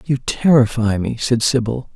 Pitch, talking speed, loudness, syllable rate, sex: 120 Hz, 155 wpm, -17 LUFS, 4.4 syllables/s, male